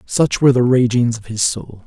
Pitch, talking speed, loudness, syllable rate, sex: 120 Hz, 225 wpm, -16 LUFS, 5.1 syllables/s, male